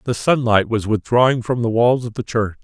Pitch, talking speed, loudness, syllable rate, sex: 115 Hz, 230 wpm, -18 LUFS, 5.4 syllables/s, male